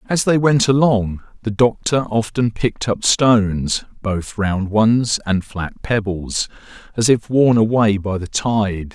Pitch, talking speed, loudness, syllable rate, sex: 110 Hz, 155 wpm, -18 LUFS, 3.8 syllables/s, male